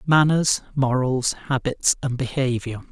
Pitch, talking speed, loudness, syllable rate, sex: 130 Hz, 105 wpm, -22 LUFS, 4.1 syllables/s, male